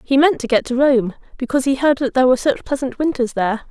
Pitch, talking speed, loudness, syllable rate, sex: 260 Hz, 260 wpm, -17 LUFS, 6.7 syllables/s, female